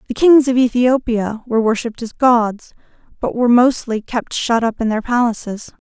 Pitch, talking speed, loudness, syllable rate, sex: 235 Hz, 175 wpm, -16 LUFS, 5.1 syllables/s, female